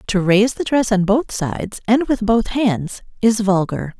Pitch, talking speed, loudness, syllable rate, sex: 215 Hz, 195 wpm, -18 LUFS, 4.4 syllables/s, female